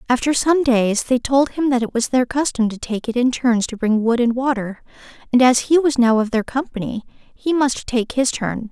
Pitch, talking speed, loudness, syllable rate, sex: 245 Hz, 235 wpm, -18 LUFS, 5.0 syllables/s, female